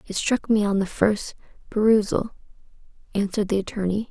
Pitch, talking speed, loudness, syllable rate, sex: 205 Hz, 145 wpm, -23 LUFS, 5.6 syllables/s, female